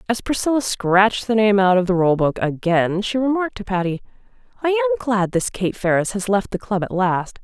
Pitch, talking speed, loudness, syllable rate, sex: 205 Hz, 220 wpm, -19 LUFS, 5.4 syllables/s, female